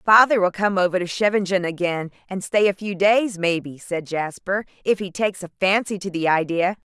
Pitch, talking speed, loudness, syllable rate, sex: 190 Hz, 200 wpm, -21 LUFS, 5.5 syllables/s, female